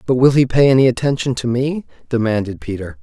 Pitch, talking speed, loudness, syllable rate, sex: 125 Hz, 200 wpm, -16 LUFS, 6.0 syllables/s, male